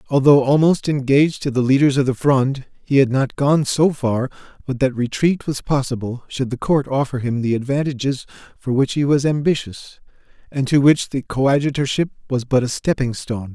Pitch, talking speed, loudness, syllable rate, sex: 135 Hz, 185 wpm, -18 LUFS, 5.4 syllables/s, male